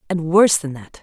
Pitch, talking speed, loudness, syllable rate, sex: 165 Hz, 235 wpm, -16 LUFS, 5.9 syllables/s, female